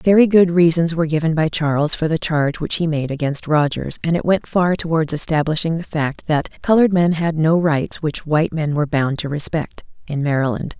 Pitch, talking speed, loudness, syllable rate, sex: 160 Hz, 210 wpm, -18 LUFS, 5.4 syllables/s, female